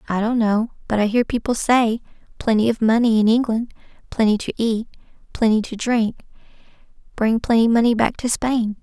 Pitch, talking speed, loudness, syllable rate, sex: 225 Hz, 155 wpm, -19 LUFS, 5.2 syllables/s, female